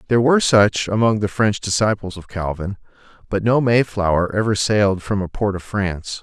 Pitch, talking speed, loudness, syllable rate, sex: 100 Hz, 185 wpm, -19 LUFS, 5.4 syllables/s, male